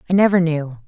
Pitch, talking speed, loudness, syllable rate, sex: 165 Hz, 205 wpm, -17 LUFS, 6.7 syllables/s, female